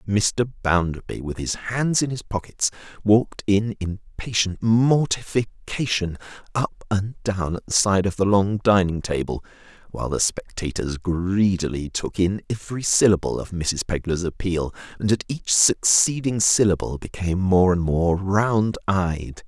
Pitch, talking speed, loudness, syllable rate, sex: 100 Hz, 140 wpm, -22 LUFS, 4.3 syllables/s, male